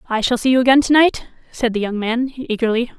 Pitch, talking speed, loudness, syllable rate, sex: 240 Hz, 240 wpm, -17 LUFS, 5.9 syllables/s, female